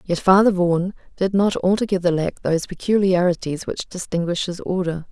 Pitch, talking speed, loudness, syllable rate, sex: 180 Hz, 155 wpm, -20 LUFS, 5.5 syllables/s, female